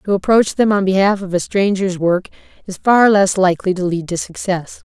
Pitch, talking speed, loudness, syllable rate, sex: 190 Hz, 205 wpm, -16 LUFS, 5.3 syllables/s, female